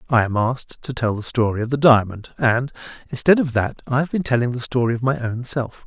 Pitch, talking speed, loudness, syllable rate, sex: 125 Hz, 245 wpm, -20 LUFS, 5.7 syllables/s, male